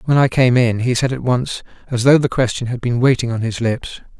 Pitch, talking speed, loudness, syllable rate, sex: 125 Hz, 255 wpm, -17 LUFS, 5.5 syllables/s, male